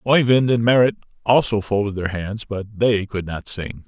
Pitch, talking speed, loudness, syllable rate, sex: 110 Hz, 185 wpm, -20 LUFS, 4.7 syllables/s, male